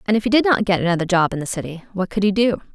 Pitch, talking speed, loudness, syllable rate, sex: 200 Hz, 330 wpm, -19 LUFS, 7.4 syllables/s, female